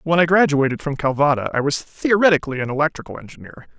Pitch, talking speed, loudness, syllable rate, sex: 150 Hz, 175 wpm, -18 LUFS, 6.7 syllables/s, male